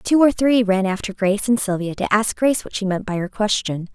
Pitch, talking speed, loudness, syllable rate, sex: 210 Hz, 260 wpm, -19 LUFS, 5.7 syllables/s, female